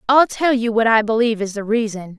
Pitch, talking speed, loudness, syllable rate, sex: 225 Hz, 245 wpm, -17 LUFS, 5.9 syllables/s, female